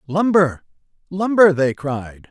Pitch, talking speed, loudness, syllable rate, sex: 160 Hz, 105 wpm, -17 LUFS, 3.5 syllables/s, male